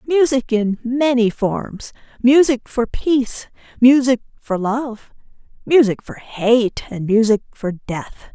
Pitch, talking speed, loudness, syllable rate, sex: 240 Hz, 110 wpm, -17 LUFS, 4.5 syllables/s, female